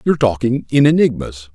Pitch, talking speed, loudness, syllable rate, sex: 125 Hz, 155 wpm, -15 LUFS, 5.8 syllables/s, male